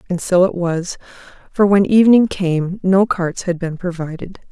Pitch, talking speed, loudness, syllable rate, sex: 180 Hz, 175 wpm, -16 LUFS, 4.6 syllables/s, female